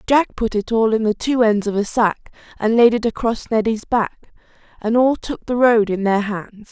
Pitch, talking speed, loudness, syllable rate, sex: 225 Hz, 225 wpm, -18 LUFS, 4.6 syllables/s, female